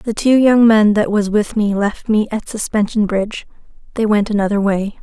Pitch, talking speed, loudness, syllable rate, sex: 210 Hz, 205 wpm, -15 LUFS, 5.0 syllables/s, female